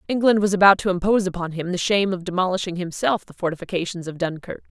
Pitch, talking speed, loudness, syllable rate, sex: 185 Hz, 200 wpm, -21 LUFS, 6.9 syllables/s, female